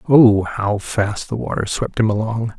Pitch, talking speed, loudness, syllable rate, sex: 110 Hz, 185 wpm, -18 LUFS, 4.2 syllables/s, male